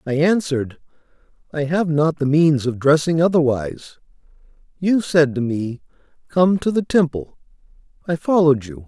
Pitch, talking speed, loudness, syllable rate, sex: 155 Hz, 140 wpm, -18 LUFS, 5.0 syllables/s, male